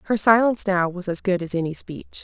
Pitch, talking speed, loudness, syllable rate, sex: 190 Hz, 240 wpm, -21 LUFS, 5.9 syllables/s, female